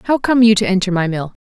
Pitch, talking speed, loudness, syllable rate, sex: 200 Hz, 295 wpm, -14 LUFS, 6.6 syllables/s, female